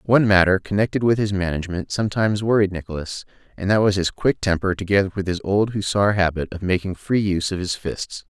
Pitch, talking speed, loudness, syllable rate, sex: 95 Hz, 200 wpm, -21 LUFS, 6.2 syllables/s, male